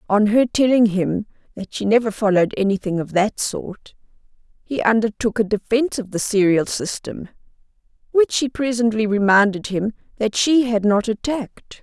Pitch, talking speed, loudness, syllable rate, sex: 220 Hz, 150 wpm, -19 LUFS, 5.0 syllables/s, female